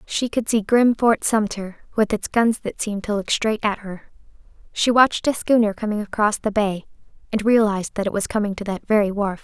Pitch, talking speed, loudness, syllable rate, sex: 210 Hz, 215 wpm, -21 LUFS, 5.5 syllables/s, female